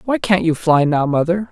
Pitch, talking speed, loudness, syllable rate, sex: 160 Hz, 235 wpm, -16 LUFS, 5.0 syllables/s, male